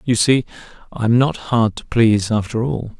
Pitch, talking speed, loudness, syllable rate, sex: 115 Hz, 200 wpm, -17 LUFS, 5.0 syllables/s, male